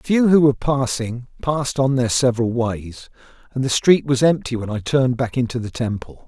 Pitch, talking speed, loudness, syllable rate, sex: 125 Hz, 210 wpm, -19 LUFS, 5.5 syllables/s, male